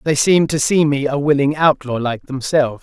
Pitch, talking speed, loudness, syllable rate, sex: 140 Hz, 210 wpm, -16 LUFS, 5.4 syllables/s, male